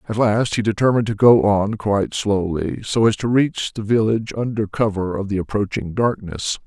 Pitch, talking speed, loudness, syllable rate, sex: 105 Hz, 190 wpm, -19 LUFS, 5.2 syllables/s, male